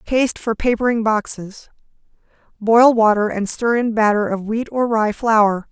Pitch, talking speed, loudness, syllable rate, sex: 220 Hz, 145 wpm, -17 LUFS, 4.5 syllables/s, female